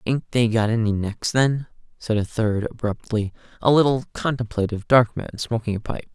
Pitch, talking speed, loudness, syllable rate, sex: 115 Hz, 165 wpm, -22 LUFS, 5.1 syllables/s, male